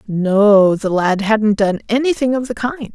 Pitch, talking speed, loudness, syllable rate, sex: 220 Hz, 185 wpm, -15 LUFS, 4.0 syllables/s, female